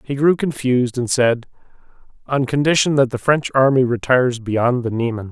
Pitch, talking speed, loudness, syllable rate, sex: 130 Hz, 170 wpm, -17 LUFS, 5.2 syllables/s, male